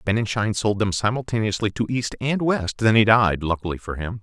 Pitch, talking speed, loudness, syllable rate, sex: 105 Hz, 200 wpm, -22 LUFS, 5.4 syllables/s, male